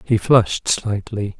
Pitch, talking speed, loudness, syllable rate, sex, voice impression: 105 Hz, 130 wpm, -18 LUFS, 3.9 syllables/s, male, masculine, very adult-like, sincere, calm, slightly kind